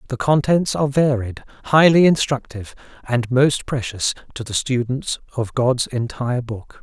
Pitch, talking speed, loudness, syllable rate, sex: 130 Hz, 140 wpm, -19 LUFS, 4.8 syllables/s, male